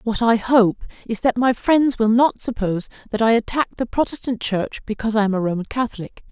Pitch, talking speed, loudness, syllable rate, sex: 230 Hz, 210 wpm, -20 LUFS, 5.7 syllables/s, female